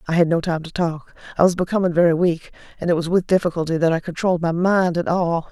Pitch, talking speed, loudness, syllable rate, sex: 170 Hz, 250 wpm, -20 LUFS, 6.4 syllables/s, female